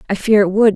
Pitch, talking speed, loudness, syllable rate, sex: 205 Hz, 320 wpm, -14 LUFS, 6.7 syllables/s, female